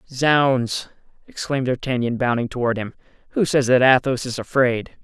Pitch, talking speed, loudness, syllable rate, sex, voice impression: 130 Hz, 145 wpm, -20 LUFS, 5.0 syllables/s, male, slightly masculine, slightly feminine, very gender-neutral, slightly adult-like, slightly middle-aged, slightly thick, slightly tensed, slightly weak, slightly dark, slightly hard, muffled, slightly halting, slightly cool, intellectual, slightly refreshing, sincere, slightly calm, slightly friendly, slightly reassuring, unique, slightly elegant, sweet, slightly lively, kind, very modest